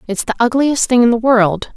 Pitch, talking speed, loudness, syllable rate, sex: 235 Hz, 240 wpm, -14 LUFS, 5.3 syllables/s, female